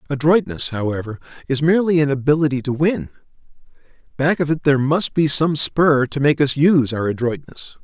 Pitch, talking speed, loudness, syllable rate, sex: 145 Hz, 170 wpm, -18 LUFS, 5.7 syllables/s, male